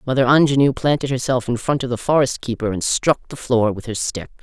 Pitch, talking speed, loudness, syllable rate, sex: 125 Hz, 230 wpm, -19 LUFS, 5.9 syllables/s, female